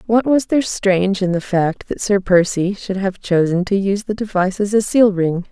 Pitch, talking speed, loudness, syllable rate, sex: 195 Hz, 230 wpm, -17 LUFS, 5.2 syllables/s, female